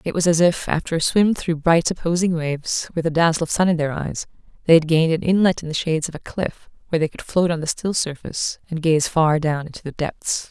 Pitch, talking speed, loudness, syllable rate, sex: 165 Hz, 255 wpm, -20 LUFS, 5.9 syllables/s, female